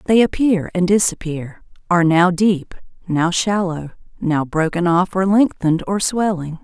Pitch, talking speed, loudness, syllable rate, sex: 180 Hz, 145 wpm, -17 LUFS, 4.4 syllables/s, female